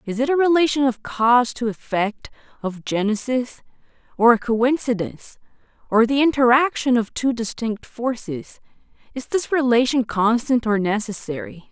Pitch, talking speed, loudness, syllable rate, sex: 240 Hz, 135 wpm, -20 LUFS, 4.7 syllables/s, female